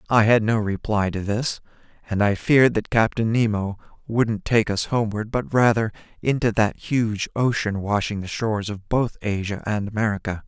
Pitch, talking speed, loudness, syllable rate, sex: 110 Hz, 170 wpm, -22 LUFS, 5.0 syllables/s, male